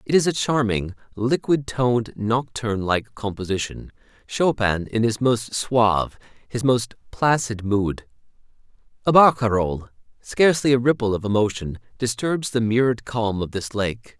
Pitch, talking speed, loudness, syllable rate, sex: 115 Hz, 135 wpm, -22 LUFS, 4.8 syllables/s, male